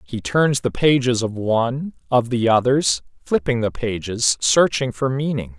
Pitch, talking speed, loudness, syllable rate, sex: 125 Hz, 160 wpm, -19 LUFS, 4.3 syllables/s, male